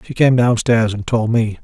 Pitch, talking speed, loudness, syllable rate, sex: 115 Hz, 220 wpm, -16 LUFS, 4.8 syllables/s, male